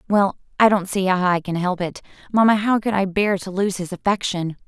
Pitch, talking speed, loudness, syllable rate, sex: 190 Hz, 230 wpm, -20 LUFS, 5.4 syllables/s, female